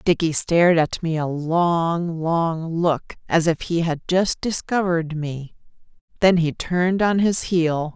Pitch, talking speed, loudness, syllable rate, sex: 170 Hz, 160 wpm, -21 LUFS, 3.9 syllables/s, female